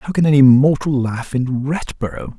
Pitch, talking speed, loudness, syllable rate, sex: 135 Hz, 175 wpm, -16 LUFS, 4.7 syllables/s, male